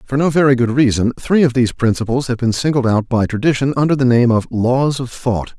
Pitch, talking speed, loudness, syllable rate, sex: 125 Hz, 235 wpm, -15 LUFS, 5.8 syllables/s, male